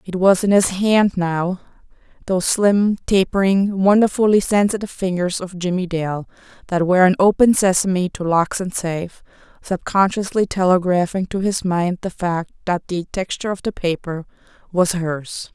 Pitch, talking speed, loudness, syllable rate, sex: 185 Hz, 145 wpm, -18 LUFS, 4.9 syllables/s, female